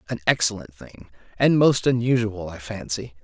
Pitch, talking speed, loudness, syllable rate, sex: 110 Hz, 130 wpm, -22 LUFS, 5.0 syllables/s, male